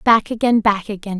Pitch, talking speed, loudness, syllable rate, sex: 210 Hz, 200 wpm, -17 LUFS, 5.2 syllables/s, female